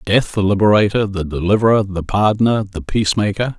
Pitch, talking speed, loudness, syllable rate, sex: 100 Hz, 165 wpm, -16 LUFS, 5.8 syllables/s, male